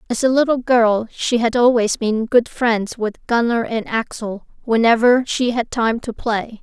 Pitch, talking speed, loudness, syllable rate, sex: 230 Hz, 180 wpm, -18 LUFS, 4.2 syllables/s, female